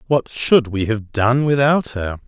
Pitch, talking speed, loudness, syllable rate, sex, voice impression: 120 Hz, 185 wpm, -18 LUFS, 3.9 syllables/s, male, very masculine, adult-like, slightly middle-aged, thick, slightly relaxed, slightly weak, slightly bright, soft, muffled, slightly fluent, cool, very intellectual, sincere, very calm, very mature, friendly, very reassuring, very unique, elegant, wild, slightly sweet, lively, very kind, slightly modest